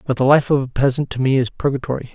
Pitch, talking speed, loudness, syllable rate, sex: 130 Hz, 280 wpm, -18 LUFS, 6.9 syllables/s, male